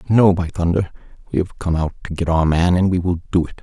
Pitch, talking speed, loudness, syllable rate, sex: 85 Hz, 265 wpm, -19 LUFS, 6.1 syllables/s, male